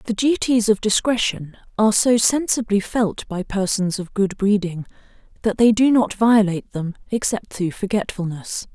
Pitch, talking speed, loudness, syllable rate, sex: 210 Hz, 150 wpm, -20 LUFS, 4.7 syllables/s, female